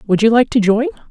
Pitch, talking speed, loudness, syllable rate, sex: 215 Hz, 270 wpm, -14 LUFS, 6.6 syllables/s, female